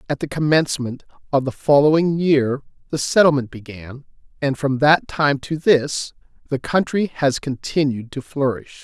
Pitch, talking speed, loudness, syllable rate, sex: 140 Hz, 150 wpm, -19 LUFS, 4.6 syllables/s, male